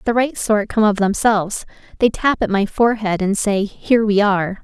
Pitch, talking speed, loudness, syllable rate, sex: 210 Hz, 205 wpm, -17 LUFS, 5.4 syllables/s, female